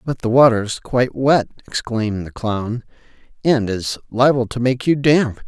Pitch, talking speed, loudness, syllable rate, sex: 120 Hz, 175 wpm, -18 LUFS, 4.7 syllables/s, male